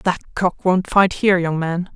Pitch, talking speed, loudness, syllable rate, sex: 180 Hz, 215 wpm, -18 LUFS, 4.7 syllables/s, female